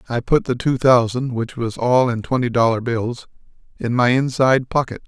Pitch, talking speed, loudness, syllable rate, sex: 125 Hz, 190 wpm, -18 LUFS, 5.1 syllables/s, male